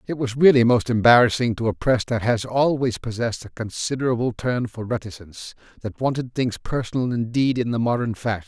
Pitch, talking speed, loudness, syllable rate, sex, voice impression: 120 Hz, 185 wpm, -21 LUFS, 5.8 syllables/s, male, masculine, adult-like, slightly powerful, slightly unique, slightly strict